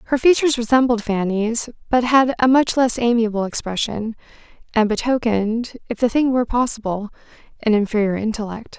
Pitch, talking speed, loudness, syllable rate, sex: 230 Hz, 145 wpm, -19 LUFS, 5.6 syllables/s, female